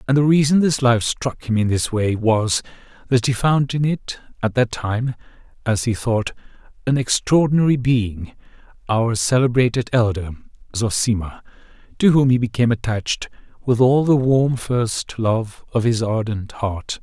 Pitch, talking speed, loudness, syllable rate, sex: 120 Hz, 155 wpm, -19 LUFS, 4.6 syllables/s, male